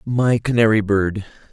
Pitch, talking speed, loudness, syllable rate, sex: 110 Hz, 120 wpm, -18 LUFS, 4.2 syllables/s, male